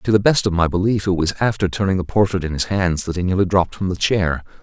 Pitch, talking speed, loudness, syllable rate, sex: 95 Hz, 285 wpm, -19 LUFS, 6.3 syllables/s, male